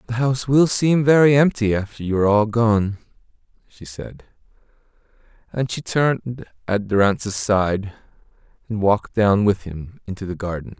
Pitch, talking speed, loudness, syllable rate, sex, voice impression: 110 Hz, 150 wpm, -19 LUFS, 4.8 syllables/s, male, masculine, adult-like, tensed, slightly weak, dark, soft, slightly halting, calm, slightly mature, friendly, reassuring, wild, lively, modest